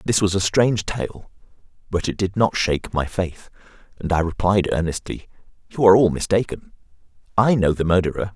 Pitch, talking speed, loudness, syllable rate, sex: 95 Hz, 170 wpm, -20 LUFS, 5.6 syllables/s, male